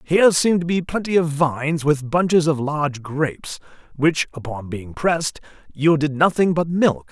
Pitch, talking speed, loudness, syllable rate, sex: 150 Hz, 170 wpm, -20 LUFS, 5.0 syllables/s, male